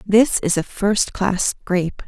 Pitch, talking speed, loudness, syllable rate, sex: 195 Hz, 145 wpm, -19 LUFS, 3.7 syllables/s, female